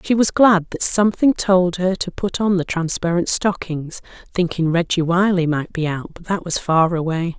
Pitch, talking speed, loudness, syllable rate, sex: 175 Hz, 195 wpm, -18 LUFS, 4.7 syllables/s, female